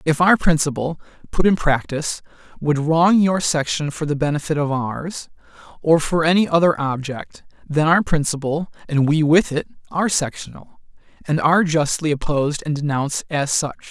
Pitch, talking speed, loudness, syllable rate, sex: 155 Hz, 160 wpm, -19 LUFS, 5.0 syllables/s, male